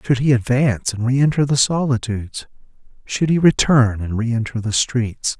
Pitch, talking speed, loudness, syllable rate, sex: 125 Hz, 155 wpm, -18 LUFS, 5.1 syllables/s, male